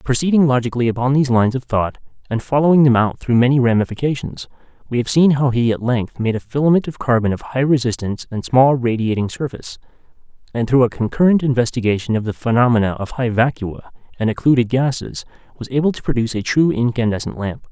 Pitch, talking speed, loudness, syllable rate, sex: 120 Hz, 185 wpm, -17 LUFS, 6.5 syllables/s, male